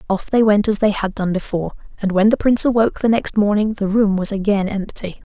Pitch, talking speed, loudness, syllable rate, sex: 205 Hz, 240 wpm, -17 LUFS, 6.1 syllables/s, female